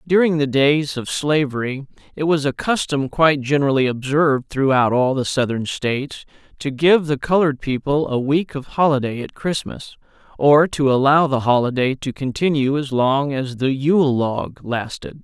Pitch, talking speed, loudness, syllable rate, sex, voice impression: 140 Hz, 165 wpm, -19 LUFS, 4.8 syllables/s, male, masculine, adult-like, slightly cool, sincere, slightly unique